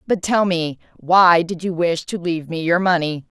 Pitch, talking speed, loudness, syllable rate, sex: 170 Hz, 215 wpm, -18 LUFS, 4.8 syllables/s, female